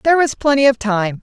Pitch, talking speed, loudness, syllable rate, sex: 255 Hz, 245 wpm, -15 LUFS, 5.9 syllables/s, female